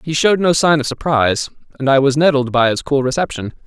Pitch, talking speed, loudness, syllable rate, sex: 140 Hz, 230 wpm, -15 LUFS, 6.3 syllables/s, male